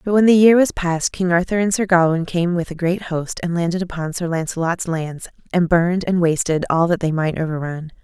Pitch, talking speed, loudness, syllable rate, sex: 175 Hz, 230 wpm, -18 LUFS, 5.6 syllables/s, female